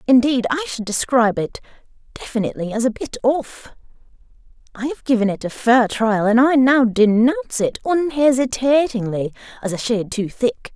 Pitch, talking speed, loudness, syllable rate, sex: 245 Hz, 155 wpm, -18 LUFS, 5.2 syllables/s, female